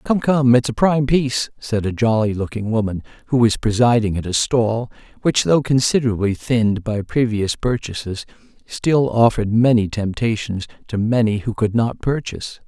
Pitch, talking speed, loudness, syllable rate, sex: 115 Hz, 160 wpm, -18 LUFS, 5.0 syllables/s, male